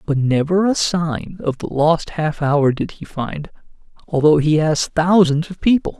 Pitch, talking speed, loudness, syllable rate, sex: 160 Hz, 180 wpm, -18 LUFS, 4.4 syllables/s, male